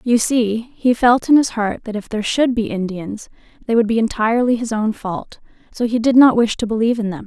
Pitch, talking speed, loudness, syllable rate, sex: 225 Hz, 240 wpm, -17 LUFS, 5.5 syllables/s, female